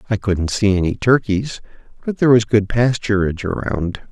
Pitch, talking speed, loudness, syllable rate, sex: 105 Hz, 160 wpm, -17 LUFS, 5.2 syllables/s, male